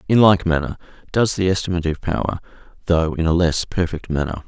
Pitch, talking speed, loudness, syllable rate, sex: 85 Hz, 175 wpm, -20 LUFS, 6.1 syllables/s, male